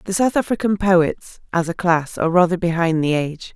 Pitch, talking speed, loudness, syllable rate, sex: 175 Hz, 205 wpm, -19 LUFS, 5.3 syllables/s, female